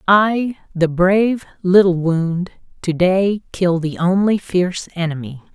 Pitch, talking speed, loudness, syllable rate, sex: 180 Hz, 130 wpm, -17 LUFS, 4.0 syllables/s, female